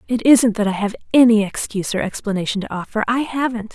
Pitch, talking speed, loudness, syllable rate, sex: 220 Hz, 210 wpm, -18 LUFS, 6.3 syllables/s, female